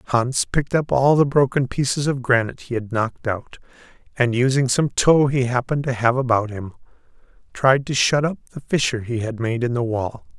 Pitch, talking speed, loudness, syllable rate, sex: 125 Hz, 200 wpm, -20 LUFS, 5.5 syllables/s, male